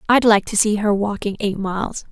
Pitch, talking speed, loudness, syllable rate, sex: 205 Hz, 225 wpm, -19 LUFS, 5.4 syllables/s, female